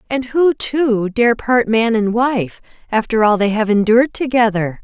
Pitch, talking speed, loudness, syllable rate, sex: 230 Hz, 175 wpm, -15 LUFS, 4.4 syllables/s, female